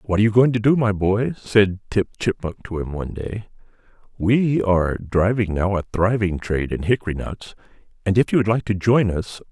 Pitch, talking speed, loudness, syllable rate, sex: 100 Hz, 210 wpm, -20 LUFS, 5.4 syllables/s, male